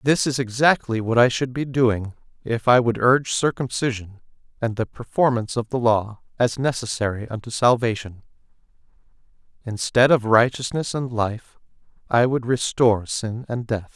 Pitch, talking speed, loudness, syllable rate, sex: 120 Hz, 145 wpm, -21 LUFS, 4.9 syllables/s, male